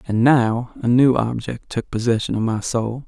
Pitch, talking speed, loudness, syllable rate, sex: 120 Hz, 195 wpm, -19 LUFS, 4.6 syllables/s, male